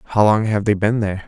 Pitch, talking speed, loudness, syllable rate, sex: 105 Hz, 285 wpm, -17 LUFS, 5.7 syllables/s, male